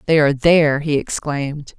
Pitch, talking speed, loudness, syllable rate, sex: 145 Hz, 170 wpm, -17 LUFS, 5.5 syllables/s, female